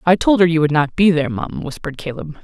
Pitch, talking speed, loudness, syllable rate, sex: 165 Hz, 270 wpm, -17 LUFS, 6.6 syllables/s, female